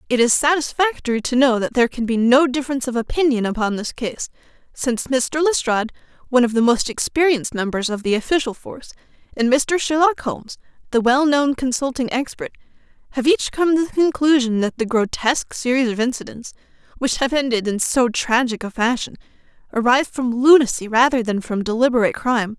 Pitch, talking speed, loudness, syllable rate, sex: 250 Hz, 175 wpm, -19 LUFS, 5.9 syllables/s, female